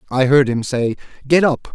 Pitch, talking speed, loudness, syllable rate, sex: 135 Hz, 205 wpm, -16 LUFS, 5.0 syllables/s, male